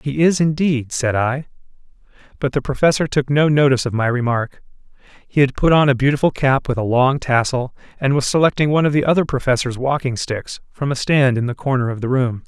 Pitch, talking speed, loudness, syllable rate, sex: 135 Hz, 210 wpm, -18 LUFS, 5.7 syllables/s, male